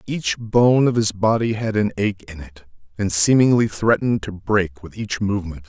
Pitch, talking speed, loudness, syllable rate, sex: 105 Hz, 190 wpm, -19 LUFS, 4.8 syllables/s, male